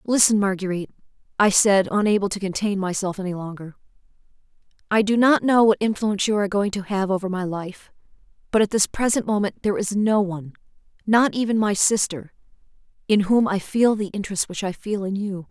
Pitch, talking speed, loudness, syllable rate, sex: 200 Hz, 185 wpm, -21 LUFS, 5.9 syllables/s, female